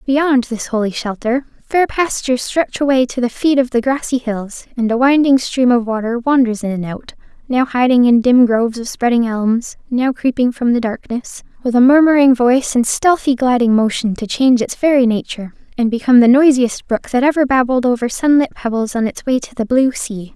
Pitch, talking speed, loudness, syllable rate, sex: 245 Hz, 205 wpm, -15 LUFS, 5.3 syllables/s, female